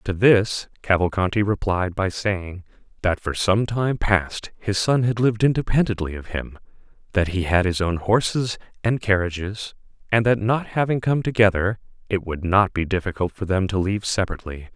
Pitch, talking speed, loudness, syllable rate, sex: 100 Hz, 170 wpm, -22 LUFS, 5.1 syllables/s, male